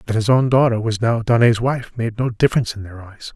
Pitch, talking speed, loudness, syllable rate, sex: 115 Hz, 250 wpm, -18 LUFS, 6.0 syllables/s, male